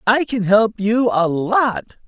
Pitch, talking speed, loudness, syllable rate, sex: 220 Hz, 175 wpm, -17 LUFS, 3.6 syllables/s, male